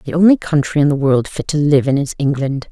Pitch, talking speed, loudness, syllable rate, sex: 145 Hz, 265 wpm, -15 LUFS, 5.9 syllables/s, female